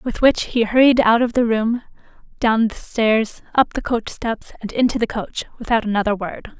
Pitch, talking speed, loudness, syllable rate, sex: 230 Hz, 190 wpm, -19 LUFS, 4.8 syllables/s, female